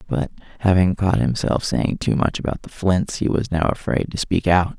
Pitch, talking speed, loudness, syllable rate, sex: 95 Hz, 215 wpm, -21 LUFS, 4.9 syllables/s, male